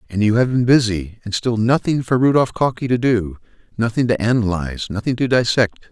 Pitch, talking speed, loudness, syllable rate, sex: 115 Hz, 195 wpm, -18 LUFS, 5.9 syllables/s, male